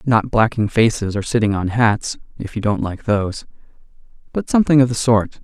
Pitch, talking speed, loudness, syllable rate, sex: 110 Hz, 175 wpm, -18 LUFS, 5.4 syllables/s, male